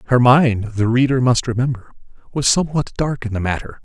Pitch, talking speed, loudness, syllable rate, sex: 125 Hz, 190 wpm, -17 LUFS, 5.6 syllables/s, male